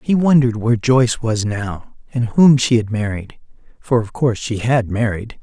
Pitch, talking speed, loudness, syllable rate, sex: 115 Hz, 190 wpm, -17 LUFS, 5.0 syllables/s, male